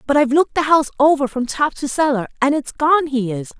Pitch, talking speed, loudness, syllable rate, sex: 280 Hz, 250 wpm, -17 LUFS, 6.3 syllables/s, female